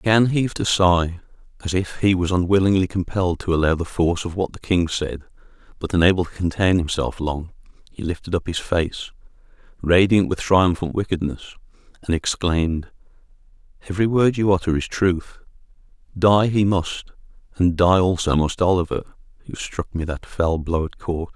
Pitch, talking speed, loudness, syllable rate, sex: 90 Hz, 165 wpm, -21 LUFS, 5.2 syllables/s, male